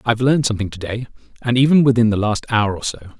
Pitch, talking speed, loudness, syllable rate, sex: 115 Hz, 245 wpm, -18 LUFS, 7.0 syllables/s, male